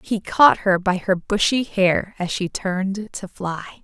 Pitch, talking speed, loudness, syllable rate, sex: 190 Hz, 190 wpm, -20 LUFS, 4.0 syllables/s, female